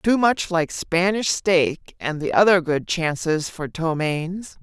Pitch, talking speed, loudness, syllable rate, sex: 175 Hz, 155 wpm, -21 LUFS, 3.8 syllables/s, female